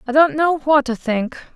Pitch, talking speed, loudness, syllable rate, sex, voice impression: 275 Hz, 230 wpm, -17 LUFS, 4.9 syllables/s, female, feminine, slightly adult-like, slightly muffled, slightly cute, slightly unique, slightly strict